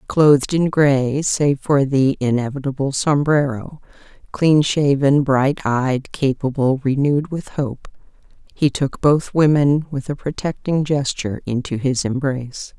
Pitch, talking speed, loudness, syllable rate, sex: 140 Hz, 125 wpm, -18 LUFS, 4.1 syllables/s, female